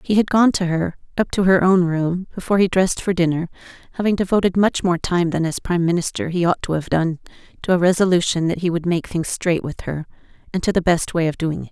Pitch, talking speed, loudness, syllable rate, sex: 175 Hz, 245 wpm, -19 LUFS, 6.1 syllables/s, female